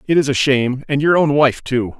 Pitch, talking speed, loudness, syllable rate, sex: 135 Hz, 270 wpm, -16 LUFS, 5.6 syllables/s, male